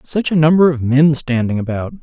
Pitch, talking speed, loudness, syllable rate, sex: 140 Hz, 205 wpm, -15 LUFS, 5.4 syllables/s, male